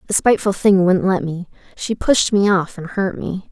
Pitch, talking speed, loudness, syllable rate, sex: 190 Hz, 220 wpm, -17 LUFS, 4.9 syllables/s, female